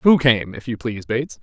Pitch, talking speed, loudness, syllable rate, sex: 125 Hz, 250 wpm, -20 LUFS, 5.8 syllables/s, male